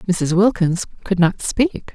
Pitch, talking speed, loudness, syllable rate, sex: 190 Hz, 155 wpm, -18 LUFS, 3.5 syllables/s, female